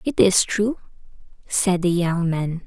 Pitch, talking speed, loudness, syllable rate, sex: 185 Hz, 160 wpm, -20 LUFS, 3.8 syllables/s, female